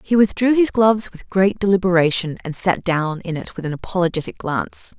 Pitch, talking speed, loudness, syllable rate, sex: 185 Hz, 190 wpm, -19 LUFS, 5.6 syllables/s, female